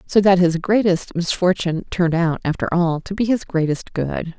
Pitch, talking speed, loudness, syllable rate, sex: 175 Hz, 190 wpm, -19 LUFS, 5.1 syllables/s, female